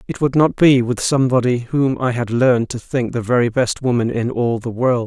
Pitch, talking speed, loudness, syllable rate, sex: 125 Hz, 235 wpm, -17 LUFS, 5.2 syllables/s, male